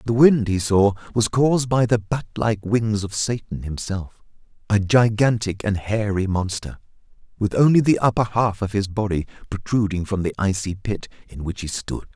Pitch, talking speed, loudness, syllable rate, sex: 105 Hz, 175 wpm, -21 LUFS, 4.9 syllables/s, male